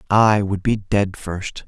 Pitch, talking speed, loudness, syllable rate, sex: 100 Hz, 180 wpm, -20 LUFS, 3.4 syllables/s, male